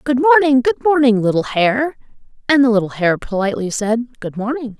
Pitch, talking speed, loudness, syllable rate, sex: 240 Hz, 175 wpm, -16 LUFS, 5.3 syllables/s, female